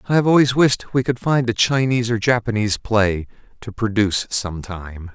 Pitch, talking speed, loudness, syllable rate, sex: 115 Hz, 175 wpm, -19 LUFS, 5.6 syllables/s, male